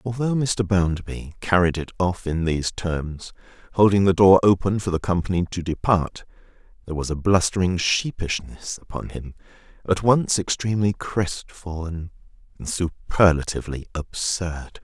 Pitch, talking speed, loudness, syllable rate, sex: 90 Hz, 130 wpm, -22 LUFS, 4.8 syllables/s, male